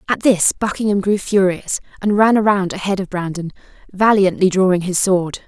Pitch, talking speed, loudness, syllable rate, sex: 190 Hz, 165 wpm, -16 LUFS, 5.2 syllables/s, female